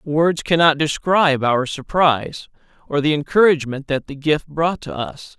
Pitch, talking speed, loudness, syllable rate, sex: 150 Hz, 155 wpm, -18 LUFS, 4.6 syllables/s, male